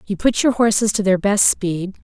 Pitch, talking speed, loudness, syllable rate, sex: 205 Hz, 230 wpm, -17 LUFS, 4.8 syllables/s, female